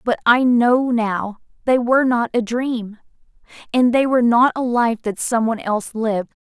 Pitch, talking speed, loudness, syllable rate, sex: 235 Hz, 185 wpm, -18 LUFS, 4.9 syllables/s, female